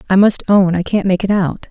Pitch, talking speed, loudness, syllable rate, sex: 190 Hz, 280 wpm, -14 LUFS, 5.4 syllables/s, female